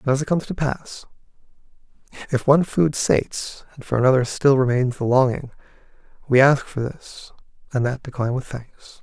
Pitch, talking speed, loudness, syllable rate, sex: 130 Hz, 175 wpm, -20 LUFS, 5.4 syllables/s, male